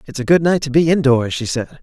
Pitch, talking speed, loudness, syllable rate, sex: 145 Hz, 295 wpm, -16 LUFS, 6.0 syllables/s, male